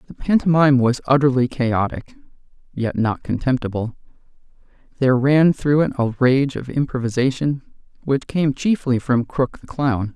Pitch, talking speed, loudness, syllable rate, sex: 130 Hz, 135 wpm, -19 LUFS, 4.8 syllables/s, male